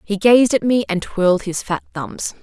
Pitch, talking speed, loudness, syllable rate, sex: 200 Hz, 225 wpm, -17 LUFS, 4.6 syllables/s, female